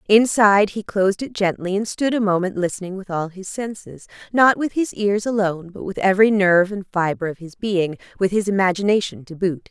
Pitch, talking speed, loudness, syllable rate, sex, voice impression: 195 Hz, 190 wpm, -20 LUFS, 5.7 syllables/s, female, very feminine, slightly middle-aged, slightly thin, very tensed, powerful, bright, slightly hard, clear, fluent, cool, intellectual, very refreshing, slightly sincere, calm, friendly, very reassuring, slightly unique, slightly elegant, slightly wild, sweet, lively, slightly strict, slightly intense, slightly sharp